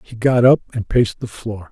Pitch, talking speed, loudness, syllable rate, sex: 115 Hz, 245 wpm, -17 LUFS, 5.4 syllables/s, male